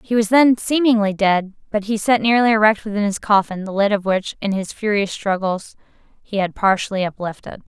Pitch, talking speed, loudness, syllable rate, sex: 205 Hz, 195 wpm, -18 LUFS, 5.4 syllables/s, female